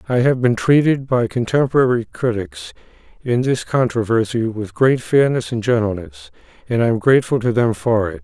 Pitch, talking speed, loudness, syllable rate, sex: 120 Hz, 170 wpm, -17 LUFS, 5.2 syllables/s, male